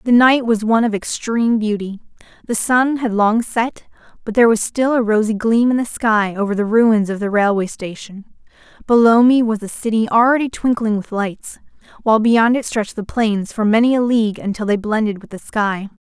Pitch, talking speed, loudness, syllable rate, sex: 220 Hz, 200 wpm, -16 LUFS, 5.3 syllables/s, female